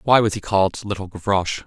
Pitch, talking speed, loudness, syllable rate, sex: 100 Hz, 215 wpm, -21 LUFS, 6.4 syllables/s, male